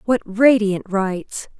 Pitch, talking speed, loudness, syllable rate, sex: 210 Hz, 115 wpm, -18 LUFS, 3.6 syllables/s, female